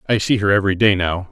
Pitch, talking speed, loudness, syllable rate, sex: 100 Hz, 275 wpm, -16 LUFS, 7.1 syllables/s, male